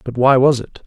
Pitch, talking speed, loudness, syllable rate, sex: 130 Hz, 280 wpm, -15 LUFS, 5.3 syllables/s, male